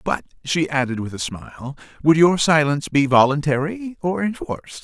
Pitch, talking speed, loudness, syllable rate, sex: 155 Hz, 160 wpm, -19 LUFS, 5.2 syllables/s, male